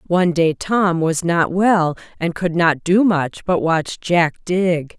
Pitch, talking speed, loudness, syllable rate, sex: 170 Hz, 180 wpm, -18 LUFS, 3.6 syllables/s, female